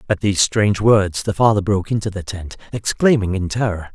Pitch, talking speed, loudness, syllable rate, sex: 100 Hz, 200 wpm, -18 LUFS, 5.9 syllables/s, male